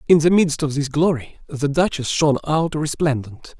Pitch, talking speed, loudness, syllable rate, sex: 150 Hz, 185 wpm, -19 LUFS, 5.0 syllables/s, male